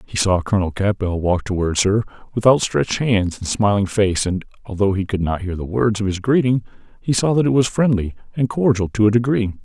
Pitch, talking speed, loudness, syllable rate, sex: 105 Hz, 220 wpm, -19 LUFS, 5.6 syllables/s, male